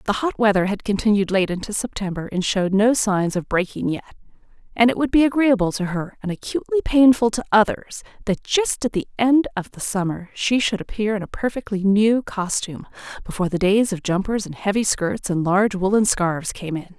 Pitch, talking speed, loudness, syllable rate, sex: 205 Hz, 200 wpm, -20 LUFS, 5.6 syllables/s, female